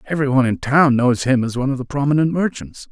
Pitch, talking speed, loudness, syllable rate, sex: 135 Hz, 245 wpm, -17 LUFS, 7.0 syllables/s, male